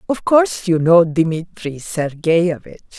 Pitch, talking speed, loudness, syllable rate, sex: 175 Hz, 120 wpm, -16 LUFS, 3.8 syllables/s, female